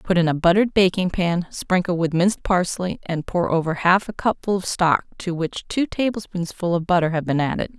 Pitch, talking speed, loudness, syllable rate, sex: 180 Hz, 210 wpm, -21 LUFS, 5.4 syllables/s, female